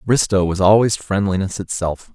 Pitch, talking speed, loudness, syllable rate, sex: 95 Hz, 140 wpm, -18 LUFS, 5.0 syllables/s, male